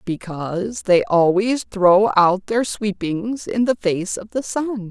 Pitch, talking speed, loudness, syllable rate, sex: 205 Hz, 160 wpm, -19 LUFS, 3.6 syllables/s, female